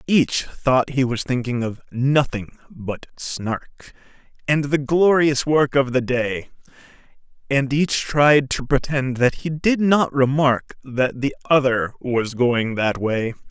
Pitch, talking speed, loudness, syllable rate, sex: 135 Hz, 145 wpm, -20 LUFS, 3.5 syllables/s, male